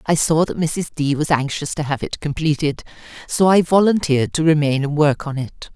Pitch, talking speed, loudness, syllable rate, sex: 150 Hz, 210 wpm, -18 LUFS, 5.3 syllables/s, female